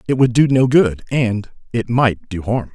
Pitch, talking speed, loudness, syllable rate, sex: 120 Hz, 220 wpm, -17 LUFS, 4.3 syllables/s, male